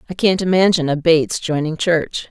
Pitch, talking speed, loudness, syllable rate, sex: 165 Hz, 180 wpm, -17 LUFS, 5.7 syllables/s, female